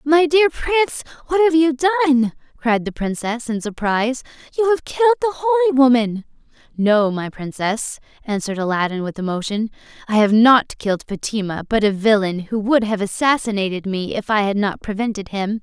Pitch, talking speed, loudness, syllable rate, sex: 240 Hz, 170 wpm, -18 LUFS, 5.6 syllables/s, female